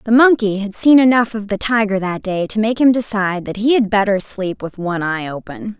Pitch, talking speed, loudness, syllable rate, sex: 210 Hz, 240 wpm, -16 LUFS, 5.5 syllables/s, female